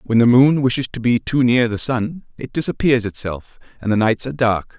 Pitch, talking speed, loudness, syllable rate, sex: 120 Hz, 225 wpm, -18 LUFS, 5.3 syllables/s, male